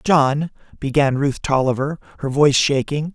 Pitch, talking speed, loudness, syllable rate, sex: 140 Hz, 135 wpm, -19 LUFS, 4.6 syllables/s, male